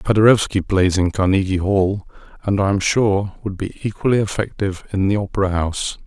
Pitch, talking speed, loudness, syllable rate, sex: 100 Hz, 170 wpm, -19 LUFS, 5.7 syllables/s, male